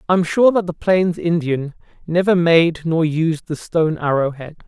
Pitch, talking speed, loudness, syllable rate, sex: 165 Hz, 195 wpm, -17 LUFS, 4.7 syllables/s, male